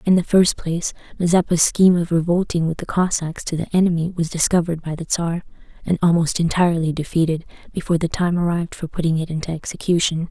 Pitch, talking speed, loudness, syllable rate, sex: 170 Hz, 185 wpm, -20 LUFS, 6.4 syllables/s, female